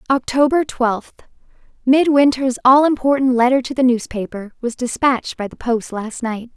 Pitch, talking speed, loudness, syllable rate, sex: 250 Hz, 135 wpm, -17 LUFS, 4.8 syllables/s, female